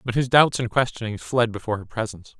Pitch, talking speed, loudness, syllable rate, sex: 115 Hz, 225 wpm, -22 LUFS, 6.6 syllables/s, male